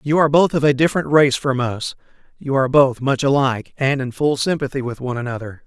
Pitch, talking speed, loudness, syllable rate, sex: 135 Hz, 225 wpm, -18 LUFS, 6.3 syllables/s, male